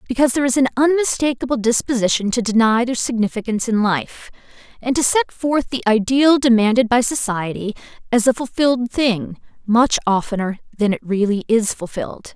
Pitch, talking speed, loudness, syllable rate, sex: 235 Hz, 155 wpm, -18 LUFS, 5.6 syllables/s, female